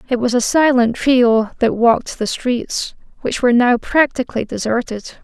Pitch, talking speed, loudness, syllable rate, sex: 245 Hz, 160 wpm, -16 LUFS, 4.7 syllables/s, female